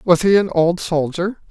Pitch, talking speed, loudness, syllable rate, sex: 175 Hz, 200 wpm, -17 LUFS, 4.3 syllables/s, male